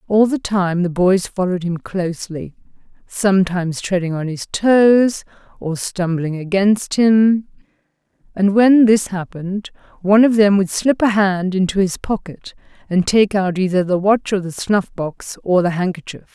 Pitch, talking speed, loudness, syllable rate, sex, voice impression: 190 Hz, 160 wpm, -17 LUFS, 4.5 syllables/s, female, feminine, adult-like, slightly weak, slightly dark, clear, calm, slightly friendly, slightly reassuring, unique, modest